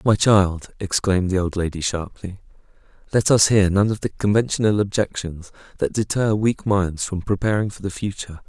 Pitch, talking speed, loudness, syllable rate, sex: 100 Hz, 170 wpm, -20 LUFS, 5.2 syllables/s, male